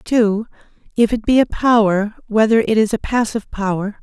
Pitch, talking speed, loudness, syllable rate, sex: 215 Hz, 180 wpm, -17 LUFS, 5.6 syllables/s, female